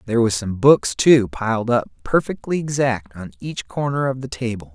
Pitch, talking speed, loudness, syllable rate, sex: 120 Hz, 190 wpm, -19 LUFS, 5.0 syllables/s, male